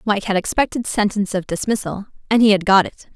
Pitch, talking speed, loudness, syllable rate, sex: 205 Hz, 210 wpm, -18 LUFS, 6.1 syllables/s, female